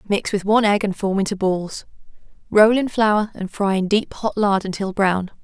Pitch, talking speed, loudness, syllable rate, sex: 200 Hz, 210 wpm, -19 LUFS, 4.8 syllables/s, female